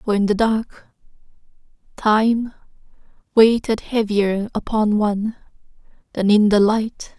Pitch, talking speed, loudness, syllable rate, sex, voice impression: 215 Hz, 110 wpm, -18 LUFS, 3.9 syllables/s, female, feminine, slightly young, tensed, slightly powerful, slightly soft, slightly raspy, slightly refreshing, calm, friendly, reassuring, slightly lively, kind